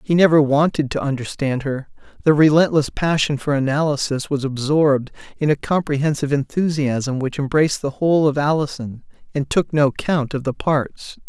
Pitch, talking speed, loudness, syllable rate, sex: 145 Hz, 160 wpm, -19 LUFS, 5.2 syllables/s, male